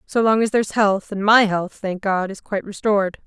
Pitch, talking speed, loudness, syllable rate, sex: 205 Hz, 240 wpm, -19 LUFS, 5.5 syllables/s, female